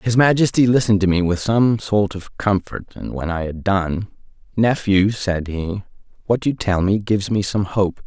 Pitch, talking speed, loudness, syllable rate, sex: 100 Hz, 195 wpm, -19 LUFS, 4.7 syllables/s, male